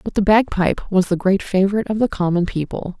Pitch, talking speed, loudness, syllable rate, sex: 195 Hz, 220 wpm, -18 LUFS, 6.4 syllables/s, female